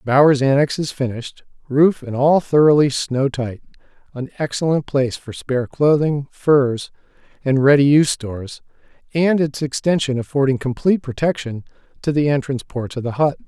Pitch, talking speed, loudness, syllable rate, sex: 140 Hz, 150 wpm, -18 LUFS, 5.3 syllables/s, male